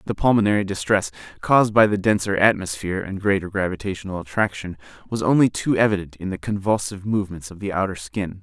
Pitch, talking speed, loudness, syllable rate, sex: 95 Hz, 170 wpm, -21 LUFS, 6.4 syllables/s, male